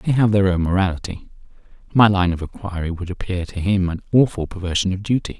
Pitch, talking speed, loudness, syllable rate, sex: 95 Hz, 200 wpm, -20 LUFS, 6.1 syllables/s, male